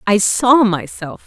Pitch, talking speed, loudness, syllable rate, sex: 205 Hz, 140 wpm, -14 LUFS, 3.5 syllables/s, female